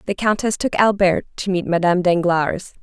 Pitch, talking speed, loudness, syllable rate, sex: 185 Hz, 170 wpm, -18 LUFS, 5.2 syllables/s, female